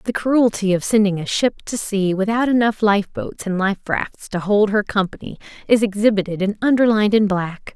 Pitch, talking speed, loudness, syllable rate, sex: 205 Hz, 195 wpm, -18 LUFS, 5.2 syllables/s, female